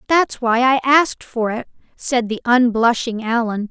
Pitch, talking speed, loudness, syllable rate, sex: 240 Hz, 160 wpm, -17 LUFS, 4.5 syllables/s, female